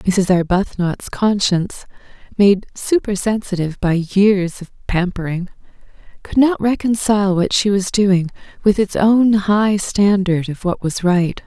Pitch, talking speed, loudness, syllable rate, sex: 195 Hz, 135 wpm, -17 LUFS, 4.1 syllables/s, female